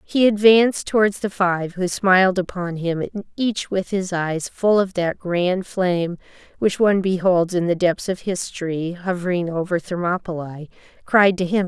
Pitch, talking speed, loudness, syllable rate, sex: 185 Hz, 170 wpm, -20 LUFS, 4.6 syllables/s, female